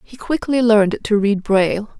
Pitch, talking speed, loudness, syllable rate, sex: 215 Hz, 180 wpm, -17 LUFS, 5.0 syllables/s, female